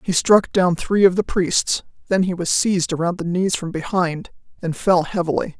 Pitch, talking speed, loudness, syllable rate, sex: 180 Hz, 205 wpm, -19 LUFS, 4.9 syllables/s, female